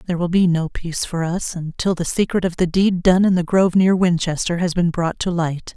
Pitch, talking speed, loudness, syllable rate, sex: 175 Hz, 250 wpm, -19 LUFS, 5.6 syllables/s, female